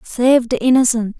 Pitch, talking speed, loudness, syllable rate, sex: 245 Hz, 150 wpm, -15 LUFS, 4.6 syllables/s, female